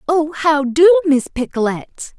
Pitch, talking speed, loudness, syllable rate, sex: 305 Hz, 135 wpm, -15 LUFS, 3.6 syllables/s, female